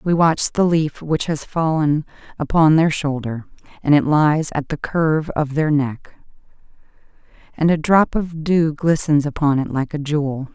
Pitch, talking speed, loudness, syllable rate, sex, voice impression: 155 Hz, 170 wpm, -18 LUFS, 4.3 syllables/s, female, feminine, adult-like, tensed, slightly powerful, slightly soft, clear, intellectual, calm, elegant, slightly lively, sharp